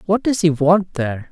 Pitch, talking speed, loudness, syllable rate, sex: 170 Hz, 230 wpm, -17 LUFS, 5.1 syllables/s, male